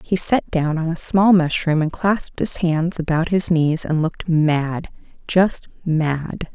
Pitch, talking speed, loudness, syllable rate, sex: 165 Hz, 165 wpm, -19 LUFS, 3.9 syllables/s, female